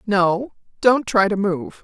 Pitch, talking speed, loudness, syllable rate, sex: 205 Hz, 165 wpm, -19 LUFS, 3.6 syllables/s, female